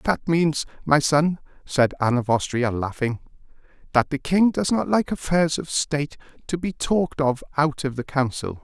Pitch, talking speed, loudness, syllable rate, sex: 150 Hz, 180 wpm, -22 LUFS, 4.7 syllables/s, male